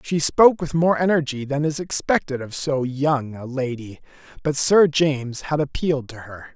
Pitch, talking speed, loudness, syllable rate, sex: 145 Hz, 185 wpm, -21 LUFS, 4.8 syllables/s, male